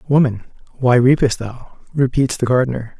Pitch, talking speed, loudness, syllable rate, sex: 125 Hz, 140 wpm, -17 LUFS, 5.2 syllables/s, male